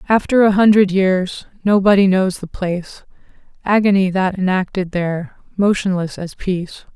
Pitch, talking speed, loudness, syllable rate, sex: 190 Hz, 130 wpm, -16 LUFS, 4.9 syllables/s, female